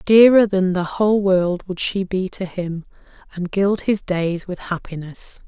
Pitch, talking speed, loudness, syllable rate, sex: 190 Hz, 175 wpm, -19 LUFS, 4.2 syllables/s, female